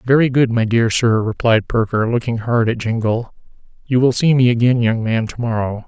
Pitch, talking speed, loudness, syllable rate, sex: 115 Hz, 205 wpm, -16 LUFS, 5.1 syllables/s, male